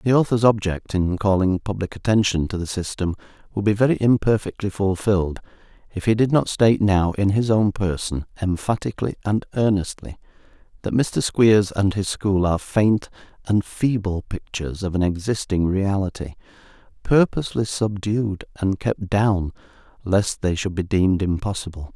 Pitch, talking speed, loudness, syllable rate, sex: 100 Hz, 150 wpm, -21 LUFS, 5.0 syllables/s, male